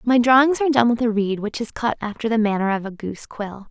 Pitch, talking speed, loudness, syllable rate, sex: 220 Hz, 275 wpm, -20 LUFS, 6.2 syllables/s, female